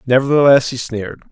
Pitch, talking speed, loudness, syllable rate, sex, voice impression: 125 Hz, 135 wpm, -14 LUFS, 6.3 syllables/s, male, very masculine, very adult-like, slightly thick, slightly fluent, slightly sincere, slightly friendly